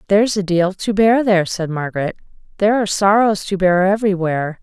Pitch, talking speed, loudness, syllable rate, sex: 195 Hz, 180 wpm, -16 LUFS, 6.3 syllables/s, female